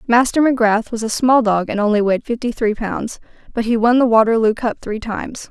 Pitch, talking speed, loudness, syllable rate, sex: 225 Hz, 220 wpm, -17 LUFS, 5.8 syllables/s, female